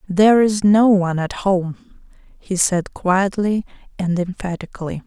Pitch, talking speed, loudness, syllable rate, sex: 190 Hz, 130 wpm, -18 LUFS, 4.4 syllables/s, female